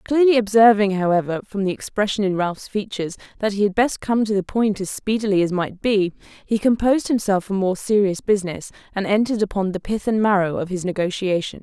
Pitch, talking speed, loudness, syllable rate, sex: 200 Hz, 200 wpm, -20 LUFS, 5.9 syllables/s, female